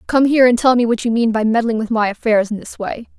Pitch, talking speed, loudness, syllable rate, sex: 230 Hz, 300 wpm, -16 LUFS, 6.4 syllables/s, female